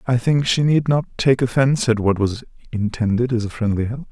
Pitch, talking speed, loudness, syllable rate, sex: 120 Hz, 220 wpm, -19 LUFS, 5.4 syllables/s, male